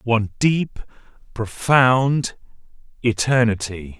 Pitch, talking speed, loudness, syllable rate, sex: 115 Hz, 60 wpm, -19 LUFS, 2.9 syllables/s, male